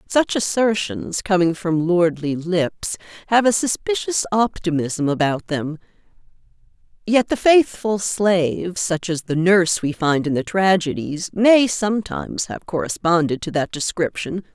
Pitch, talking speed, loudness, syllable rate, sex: 185 Hz, 130 wpm, -19 LUFS, 4.3 syllables/s, female